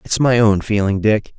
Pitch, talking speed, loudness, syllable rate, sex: 105 Hz, 215 wpm, -16 LUFS, 4.7 syllables/s, male